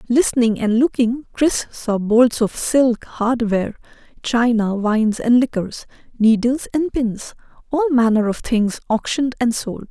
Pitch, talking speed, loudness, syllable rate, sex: 235 Hz, 135 wpm, -18 LUFS, 4.2 syllables/s, female